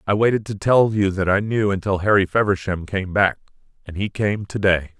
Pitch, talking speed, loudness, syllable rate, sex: 100 Hz, 215 wpm, -20 LUFS, 5.3 syllables/s, male